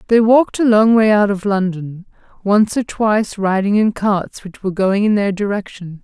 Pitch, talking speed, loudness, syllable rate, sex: 205 Hz, 200 wpm, -15 LUFS, 5.0 syllables/s, female